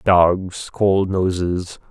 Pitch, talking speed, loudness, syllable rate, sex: 90 Hz, 95 wpm, -19 LUFS, 2.3 syllables/s, male